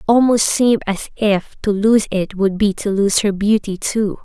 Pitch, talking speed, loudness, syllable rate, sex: 205 Hz, 210 wpm, -17 LUFS, 4.5 syllables/s, female